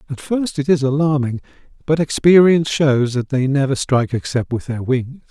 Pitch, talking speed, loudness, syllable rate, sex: 140 Hz, 180 wpm, -17 LUFS, 5.2 syllables/s, male